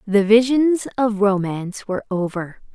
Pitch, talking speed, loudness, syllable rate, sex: 210 Hz, 130 wpm, -19 LUFS, 4.6 syllables/s, female